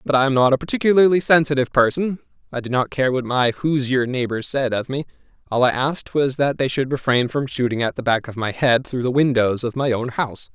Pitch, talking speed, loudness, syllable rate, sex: 130 Hz, 240 wpm, -19 LUFS, 5.9 syllables/s, male